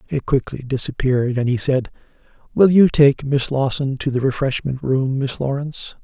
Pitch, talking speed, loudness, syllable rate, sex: 135 Hz, 170 wpm, -19 LUFS, 5.1 syllables/s, male